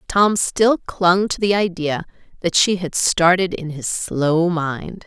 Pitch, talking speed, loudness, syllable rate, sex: 175 Hz, 165 wpm, -18 LUFS, 3.6 syllables/s, female